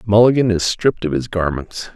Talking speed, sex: 185 wpm, male